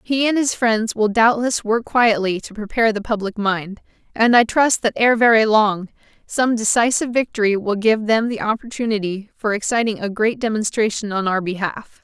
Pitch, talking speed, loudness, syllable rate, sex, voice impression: 220 Hz, 180 wpm, -18 LUFS, 5.1 syllables/s, female, feminine, adult-like, tensed, powerful, bright, clear, intellectual, calm, friendly, reassuring, elegant, lively